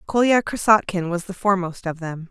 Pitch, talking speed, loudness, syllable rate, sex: 190 Hz, 180 wpm, -21 LUFS, 5.5 syllables/s, female